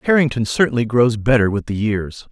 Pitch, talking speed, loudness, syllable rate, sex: 120 Hz, 180 wpm, -17 LUFS, 5.3 syllables/s, male